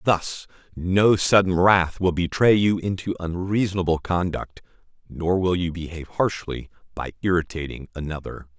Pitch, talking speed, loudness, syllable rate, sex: 90 Hz, 125 wpm, -23 LUFS, 4.7 syllables/s, male